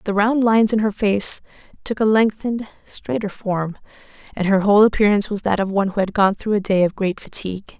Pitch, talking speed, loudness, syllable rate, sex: 205 Hz, 215 wpm, -19 LUFS, 6.0 syllables/s, female